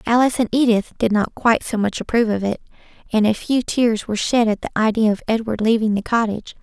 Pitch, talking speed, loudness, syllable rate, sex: 220 Hz, 225 wpm, -19 LUFS, 6.4 syllables/s, female